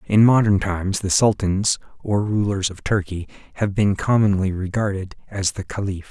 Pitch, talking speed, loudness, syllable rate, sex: 100 Hz, 155 wpm, -20 LUFS, 4.9 syllables/s, male